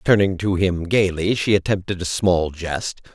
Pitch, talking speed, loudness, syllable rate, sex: 95 Hz, 170 wpm, -20 LUFS, 4.4 syllables/s, male